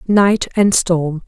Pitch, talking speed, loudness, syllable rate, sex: 185 Hz, 140 wpm, -15 LUFS, 2.9 syllables/s, female